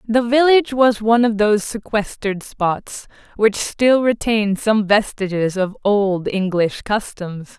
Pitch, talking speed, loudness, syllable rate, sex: 215 Hz, 135 wpm, -18 LUFS, 4.0 syllables/s, female